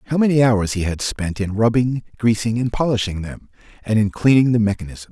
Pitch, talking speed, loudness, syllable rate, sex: 110 Hz, 200 wpm, -19 LUFS, 5.6 syllables/s, male